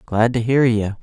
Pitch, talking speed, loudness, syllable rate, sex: 115 Hz, 235 wpm, -17 LUFS, 4.5 syllables/s, male